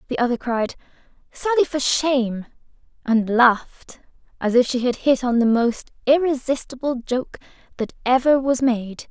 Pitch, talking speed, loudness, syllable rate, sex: 250 Hz, 145 wpm, -20 LUFS, 4.6 syllables/s, female